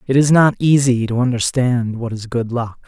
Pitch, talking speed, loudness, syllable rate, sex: 125 Hz, 210 wpm, -16 LUFS, 4.8 syllables/s, male